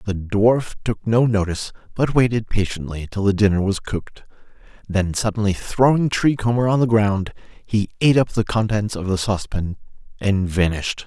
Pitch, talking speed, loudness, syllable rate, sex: 105 Hz, 170 wpm, -20 LUFS, 5.2 syllables/s, male